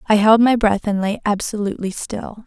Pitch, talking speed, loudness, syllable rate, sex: 210 Hz, 195 wpm, -18 LUFS, 5.2 syllables/s, female